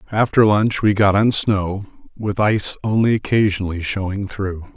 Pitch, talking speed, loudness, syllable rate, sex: 100 Hz, 150 wpm, -18 LUFS, 4.9 syllables/s, male